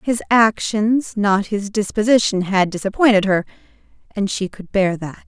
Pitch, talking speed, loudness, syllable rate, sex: 205 Hz, 150 wpm, -18 LUFS, 4.6 syllables/s, female